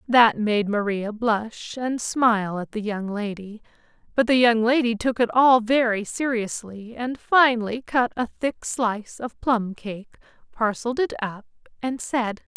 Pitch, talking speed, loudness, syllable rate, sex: 230 Hz, 155 wpm, -23 LUFS, 4.3 syllables/s, female